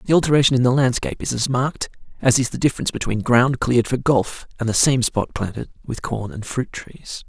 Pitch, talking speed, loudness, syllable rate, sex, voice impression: 125 Hz, 225 wpm, -20 LUFS, 6.0 syllables/s, male, masculine, adult-like, slightly cool, sincere, slightly sweet